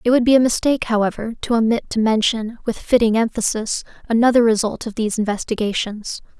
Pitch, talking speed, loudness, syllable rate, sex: 225 Hz, 170 wpm, -19 LUFS, 6.0 syllables/s, female